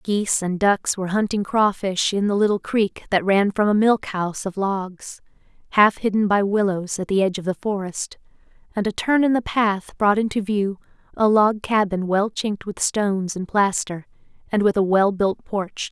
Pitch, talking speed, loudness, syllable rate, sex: 200 Hz, 195 wpm, -21 LUFS, 4.8 syllables/s, female